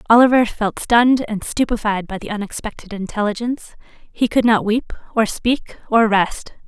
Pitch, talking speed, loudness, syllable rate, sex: 220 Hz, 155 wpm, -18 LUFS, 4.9 syllables/s, female